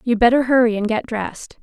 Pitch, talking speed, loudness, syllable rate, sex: 235 Hz, 220 wpm, -17 LUFS, 6.1 syllables/s, female